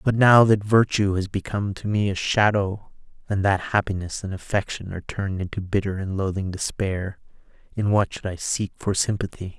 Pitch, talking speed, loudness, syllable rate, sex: 100 Hz, 180 wpm, -23 LUFS, 5.2 syllables/s, male